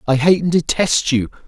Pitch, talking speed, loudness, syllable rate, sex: 155 Hz, 205 wpm, -16 LUFS, 5.1 syllables/s, male